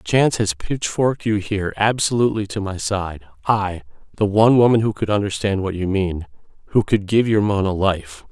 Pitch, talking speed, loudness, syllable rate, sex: 100 Hz, 180 wpm, -19 LUFS, 5.4 syllables/s, male